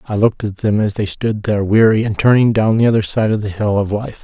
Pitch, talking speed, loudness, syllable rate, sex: 105 Hz, 285 wpm, -15 LUFS, 6.2 syllables/s, male